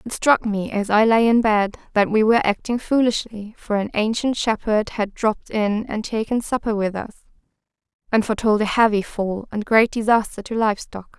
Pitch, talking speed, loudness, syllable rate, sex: 215 Hz, 195 wpm, -20 LUFS, 5.1 syllables/s, female